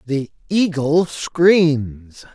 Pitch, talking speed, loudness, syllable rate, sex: 150 Hz, 75 wpm, -17 LUFS, 2.0 syllables/s, male